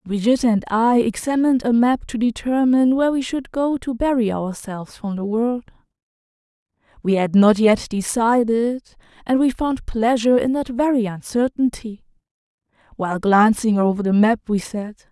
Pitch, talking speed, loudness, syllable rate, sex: 230 Hz, 150 wpm, -19 LUFS, 5.0 syllables/s, female